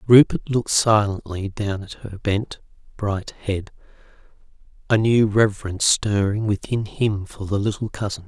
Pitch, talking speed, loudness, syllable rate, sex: 105 Hz, 140 wpm, -21 LUFS, 4.6 syllables/s, male